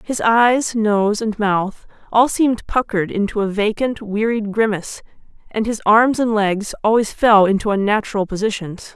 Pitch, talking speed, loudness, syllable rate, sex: 215 Hz, 155 wpm, -17 LUFS, 4.8 syllables/s, female